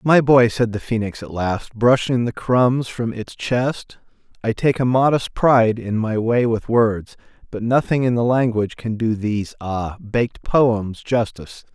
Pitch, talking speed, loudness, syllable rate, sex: 115 Hz, 170 wpm, -19 LUFS, 4.3 syllables/s, male